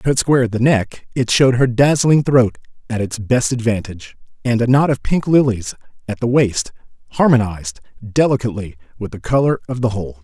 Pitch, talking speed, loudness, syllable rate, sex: 120 Hz, 180 wpm, -16 LUFS, 5.7 syllables/s, male